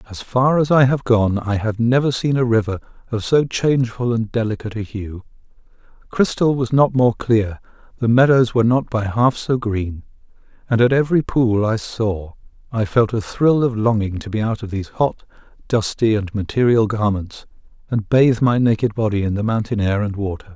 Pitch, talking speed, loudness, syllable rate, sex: 115 Hz, 190 wpm, -18 LUFS, 5.1 syllables/s, male